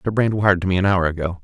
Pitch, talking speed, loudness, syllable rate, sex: 95 Hz, 335 wpm, -19 LUFS, 7.2 syllables/s, male